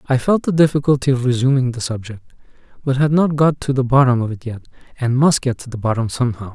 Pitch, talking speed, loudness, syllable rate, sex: 130 Hz, 230 wpm, -17 LUFS, 6.5 syllables/s, male